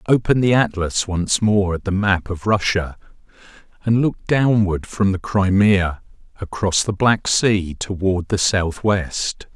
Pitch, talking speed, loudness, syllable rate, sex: 100 Hz, 145 wpm, -19 LUFS, 3.8 syllables/s, male